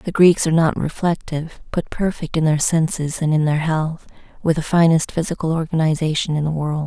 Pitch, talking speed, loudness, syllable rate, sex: 160 Hz, 190 wpm, -19 LUFS, 5.5 syllables/s, female